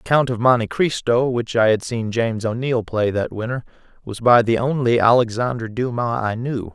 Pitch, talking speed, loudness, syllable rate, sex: 120 Hz, 195 wpm, -19 LUFS, 5.1 syllables/s, male